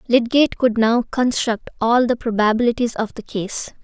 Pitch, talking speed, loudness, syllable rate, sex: 235 Hz, 155 wpm, -19 LUFS, 5.0 syllables/s, female